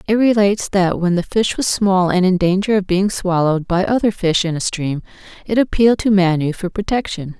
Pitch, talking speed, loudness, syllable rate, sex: 190 Hz, 210 wpm, -17 LUFS, 5.4 syllables/s, female